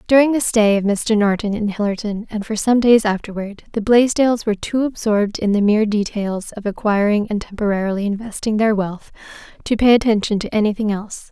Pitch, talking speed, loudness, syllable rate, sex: 215 Hz, 185 wpm, -18 LUFS, 5.7 syllables/s, female